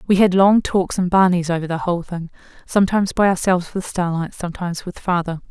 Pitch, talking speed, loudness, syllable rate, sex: 180 Hz, 185 wpm, -19 LUFS, 6.3 syllables/s, female